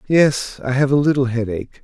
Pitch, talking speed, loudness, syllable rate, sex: 130 Hz, 195 wpm, -18 LUFS, 5.4 syllables/s, male